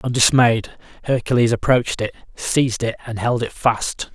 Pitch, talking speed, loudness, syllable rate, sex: 120 Hz, 145 wpm, -19 LUFS, 5.0 syllables/s, male